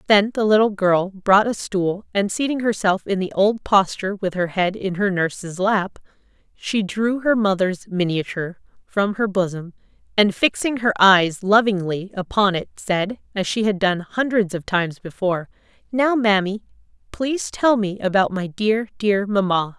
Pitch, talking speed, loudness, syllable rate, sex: 200 Hz, 165 wpm, -20 LUFS, 4.6 syllables/s, female